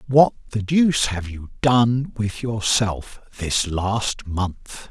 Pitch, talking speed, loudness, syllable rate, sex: 110 Hz, 135 wpm, -21 LUFS, 3.1 syllables/s, male